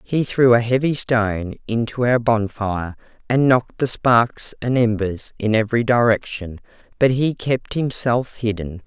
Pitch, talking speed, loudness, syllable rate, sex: 115 Hz, 150 wpm, -19 LUFS, 4.5 syllables/s, female